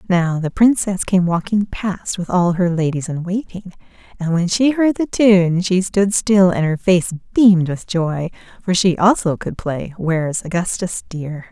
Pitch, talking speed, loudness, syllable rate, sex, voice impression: 185 Hz, 190 wpm, -17 LUFS, 4.4 syllables/s, female, very feminine, middle-aged, relaxed, slightly weak, bright, very soft, very clear, fluent, slightly raspy, very cute, very intellectual, very refreshing, sincere, very calm, very friendly, very reassuring, very unique, very elegant, very sweet, lively, very kind, slightly modest, light